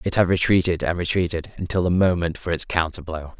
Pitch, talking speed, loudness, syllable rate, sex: 85 Hz, 210 wpm, -22 LUFS, 5.9 syllables/s, male